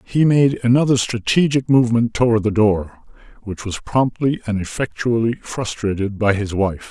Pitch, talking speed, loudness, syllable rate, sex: 115 Hz, 150 wpm, -18 LUFS, 4.8 syllables/s, male